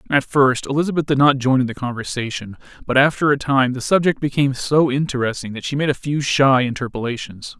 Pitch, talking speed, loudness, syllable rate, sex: 135 Hz, 195 wpm, -18 LUFS, 5.9 syllables/s, male